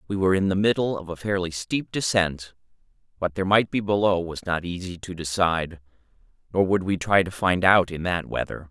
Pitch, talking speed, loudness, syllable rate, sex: 95 Hz, 205 wpm, -24 LUFS, 5.6 syllables/s, male